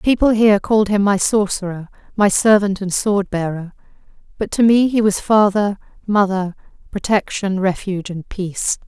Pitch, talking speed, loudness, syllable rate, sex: 200 Hz, 150 wpm, -17 LUFS, 5.0 syllables/s, female